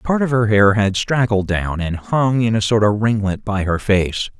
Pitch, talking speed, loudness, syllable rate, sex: 105 Hz, 230 wpm, -17 LUFS, 4.4 syllables/s, male